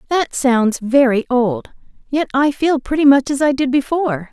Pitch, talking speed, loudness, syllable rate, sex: 270 Hz, 180 wpm, -16 LUFS, 4.7 syllables/s, female